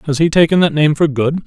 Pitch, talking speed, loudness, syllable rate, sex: 155 Hz, 285 wpm, -13 LUFS, 6.2 syllables/s, male